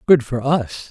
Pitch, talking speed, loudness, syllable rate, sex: 130 Hz, 200 wpm, -18 LUFS, 4.1 syllables/s, male